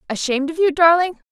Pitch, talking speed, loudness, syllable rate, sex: 315 Hz, 180 wpm, -17 LUFS, 6.7 syllables/s, female